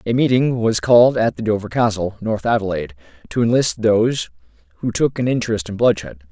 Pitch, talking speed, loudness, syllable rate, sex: 110 Hz, 180 wpm, -18 LUFS, 5.9 syllables/s, male